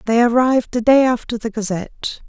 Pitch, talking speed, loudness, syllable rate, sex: 230 Hz, 185 wpm, -17 LUFS, 5.8 syllables/s, female